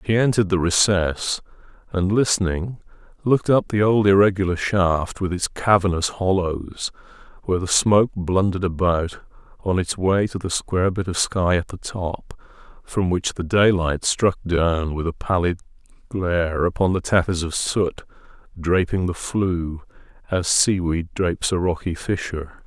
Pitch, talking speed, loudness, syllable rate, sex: 90 Hz, 150 wpm, -21 LUFS, 4.6 syllables/s, male